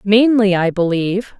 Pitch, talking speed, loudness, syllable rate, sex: 200 Hz, 130 wpm, -15 LUFS, 4.7 syllables/s, female